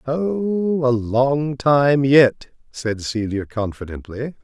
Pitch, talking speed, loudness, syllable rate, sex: 130 Hz, 110 wpm, -19 LUFS, 3.0 syllables/s, male